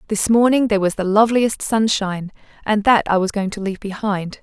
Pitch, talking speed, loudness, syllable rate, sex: 205 Hz, 205 wpm, -18 LUFS, 5.9 syllables/s, female